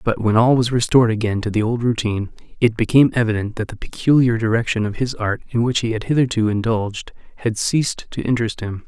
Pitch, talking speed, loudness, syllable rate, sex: 115 Hz, 210 wpm, -19 LUFS, 6.3 syllables/s, male